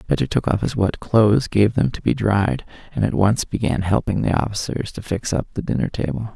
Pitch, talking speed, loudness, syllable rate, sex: 105 Hz, 225 wpm, -20 LUFS, 5.5 syllables/s, male